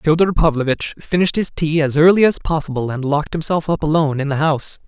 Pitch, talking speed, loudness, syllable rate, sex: 155 Hz, 210 wpm, -17 LUFS, 6.4 syllables/s, male